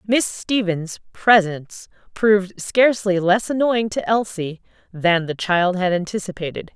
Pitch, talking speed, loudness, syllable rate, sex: 195 Hz, 125 wpm, -19 LUFS, 4.3 syllables/s, female